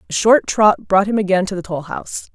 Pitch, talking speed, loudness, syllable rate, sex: 195 Hz, 255 wpm, -16 LUFS, 5.8 syllables/s, female